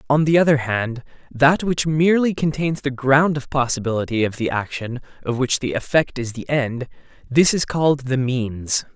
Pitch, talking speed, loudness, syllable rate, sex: 135 Hz, 180 wpm, -20 LUFS, 4.9 syllables/s, male